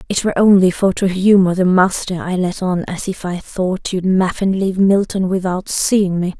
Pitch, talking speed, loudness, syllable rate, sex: 185 Hz, 205 wpm, -16 LUFS, 4.9 syllables/s, female